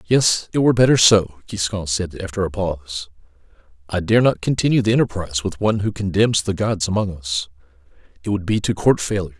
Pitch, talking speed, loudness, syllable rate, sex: 95 Hz, 190 wpm, -19 LUFS, 5.9 syllables/s, male